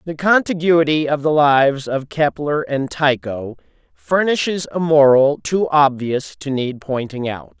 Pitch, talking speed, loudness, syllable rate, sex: 145 Hz, 140 wpm, -17 LUFS, 4.2 syllables/s, male